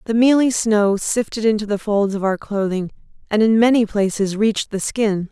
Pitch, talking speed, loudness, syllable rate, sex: 210 Hz, 190 wpm, -18 LUFS, 5.0 syllables/s, female